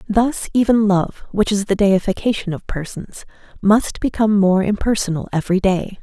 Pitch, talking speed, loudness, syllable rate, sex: 200 Hz, 150 wpm, -18 LUFS, 5.1 syllables/s, female